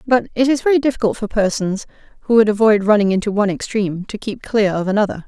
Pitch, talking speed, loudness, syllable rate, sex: 215 Hz, 215 wpm, -17 LUFS, 6.6 syllables/s, female